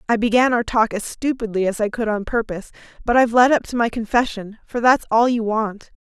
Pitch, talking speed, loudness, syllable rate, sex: 225 Hz, 230 wpm, -19 LUFS, 5.9 syllables/s, female